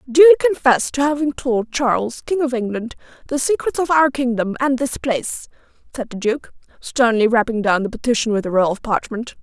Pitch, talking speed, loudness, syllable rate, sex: 250 Hz, 195 wpm, -18 LUFS, 5.4 syllables/s, female